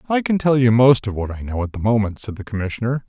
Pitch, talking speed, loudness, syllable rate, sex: 115 Hz, 290 wpm, -19 LUFS, 6.6 syllables/s, male